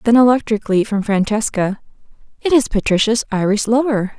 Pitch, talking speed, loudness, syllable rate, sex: 220 Hz, 130 wpm, -16 LUFS, 5.6 syllables/s, female